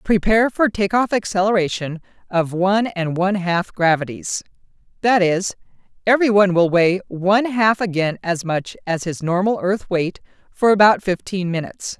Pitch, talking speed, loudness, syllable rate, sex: 190 Hz, 145 wpm, -19 LUFS, 5.0 syllables/s, female